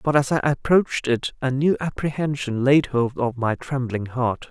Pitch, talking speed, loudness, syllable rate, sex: 135 Hz, 185 wpm, -22 LUFS, 4.7 syllables/s, male